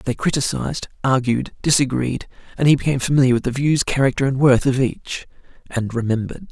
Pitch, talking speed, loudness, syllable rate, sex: 130 Hz, 165 wpm, -19 LUFS, 5.9 syllables/s, male